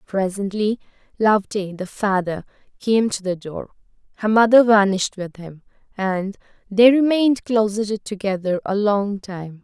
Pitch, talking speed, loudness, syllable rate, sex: 205 Hz, 130 wpm, -19 LUFS, 4.7 syllables/s, female